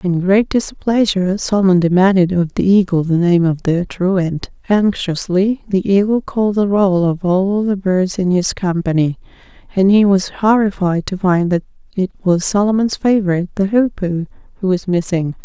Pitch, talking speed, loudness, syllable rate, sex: 190 Hz, 165 wpm, -15 LUFS, 4.8 syllables/s, female